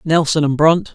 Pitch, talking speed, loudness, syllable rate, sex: 155 Hz, 190 wpm, -15 LUFS, 6.0 syllables/s, male